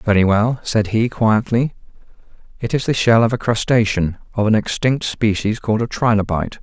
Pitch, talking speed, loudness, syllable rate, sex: 110 Hz, 170 wpm, -17 LUFS, 5.2 syllables/s, male